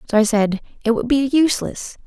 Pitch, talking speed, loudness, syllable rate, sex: 245 Hz, 205 wpm, -18 LUFS, 6.0 syllables/s, female